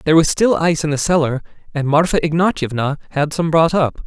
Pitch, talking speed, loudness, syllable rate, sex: 155 Hz, 205 wpm, -17 LUFS, 6.1 syllables/s, male